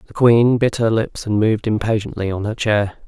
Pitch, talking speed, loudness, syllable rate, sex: 110 Hz, 215 wpm, -18 LUFS, 5.2 syllables/s, male